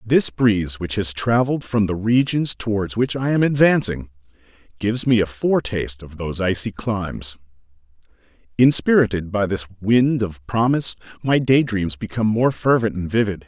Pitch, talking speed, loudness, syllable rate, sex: 105 Hz, 150 wpm, -20 LUFS, 5.2 syllables/s, male